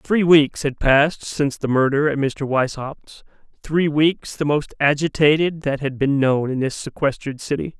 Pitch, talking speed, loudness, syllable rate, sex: 145 Hz, 170 wpm, -19 LUFS, 4.7 syllables/s, male